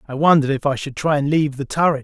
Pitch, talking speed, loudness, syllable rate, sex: 145 Hz, 295 wpm, -18 LUFS, 7.3 syllables/s, male